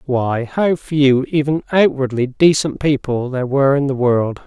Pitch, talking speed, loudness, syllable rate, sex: 135 Hz, 160 wpm, -16 LUFS, 4.5 syllables/s, male